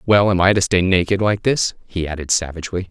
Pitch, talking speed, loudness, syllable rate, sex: 95 Hz, 225 wpm, -18 LUFS, 6.0 syllables/s, male